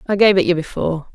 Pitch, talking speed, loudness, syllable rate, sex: 180 Hz, 265 wpm, -17 LUFS, 7.2 syllables/s, female